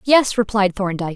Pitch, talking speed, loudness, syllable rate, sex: 205 Hz, 155 wpm, -18 LUFS, 5.7 syllables/s, female